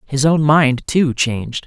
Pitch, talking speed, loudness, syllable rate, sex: 140 Hz, 180 wpm, -16 LUFS, 3.9 syllables/s, male